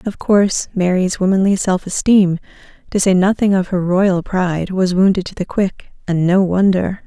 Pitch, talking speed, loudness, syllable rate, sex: 190 Hz, 180 wpm, -16 LUFS, 4.9 syllables/s, female